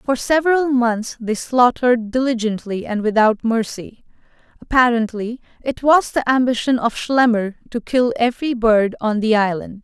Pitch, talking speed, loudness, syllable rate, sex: 235 Hz, 140 wpm, -18 LUFS, 4.7 syllables/s, female